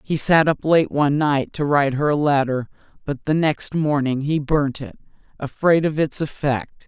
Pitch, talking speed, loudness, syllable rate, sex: 145 Hz, 190 wpm, -20 LUFS, 4.8 syllables/s, female